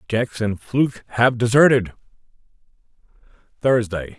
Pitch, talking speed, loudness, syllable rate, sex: 115 Hz, 85 wpm, -19 LUFS, 4.7 syllables/s, male